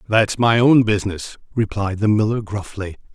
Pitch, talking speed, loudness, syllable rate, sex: 105 Hz, 150 wpm, -18 LUFS, 5.0 syllables/s, male